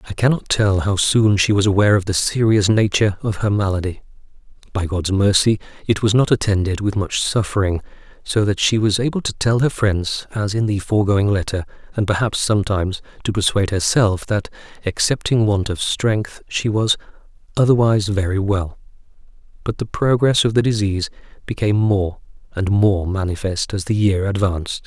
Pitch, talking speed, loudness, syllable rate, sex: 100 Hz, 170 wpm, -18 LUFS, 5.4 syllables/s, male